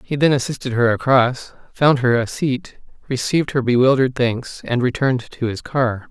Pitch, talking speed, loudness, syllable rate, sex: 130 Hz, 175 wpm, -18 LUFS, 5.1 syllables/s, male